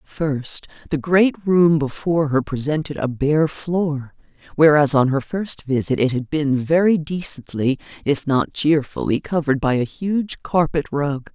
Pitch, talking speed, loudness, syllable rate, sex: 150 Hz, 155 wpm, -20 LUFS, 4.2 syllables/s, female